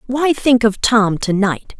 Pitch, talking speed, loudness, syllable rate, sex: 230 Hz, 200 wpm, -15 LUFS, 3.7 syllables/s, female